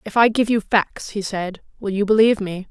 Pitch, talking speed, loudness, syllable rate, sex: 205 Hz, 245 wpm, -19 LUFS, 5.4 syllables/s, female